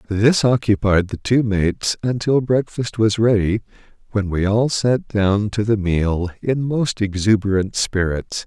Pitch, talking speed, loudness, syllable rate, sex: 105 Hz, 150 wpm, -19 LUFS, 4.1 syllables/s, male